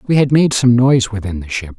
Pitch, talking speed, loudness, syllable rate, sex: 120 Hz, 270 wpm, -14 LUFS, 5.7 syllables/s, male